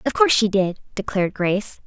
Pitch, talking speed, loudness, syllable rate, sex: 205 Hz, 195 wpm, -20 LUFS, 6.6 syllables/s, female